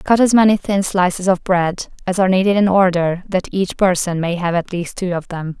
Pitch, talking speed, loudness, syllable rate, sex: 185 Hz, 235 wpm, -17 LUFS, 5.3 syllables/s, female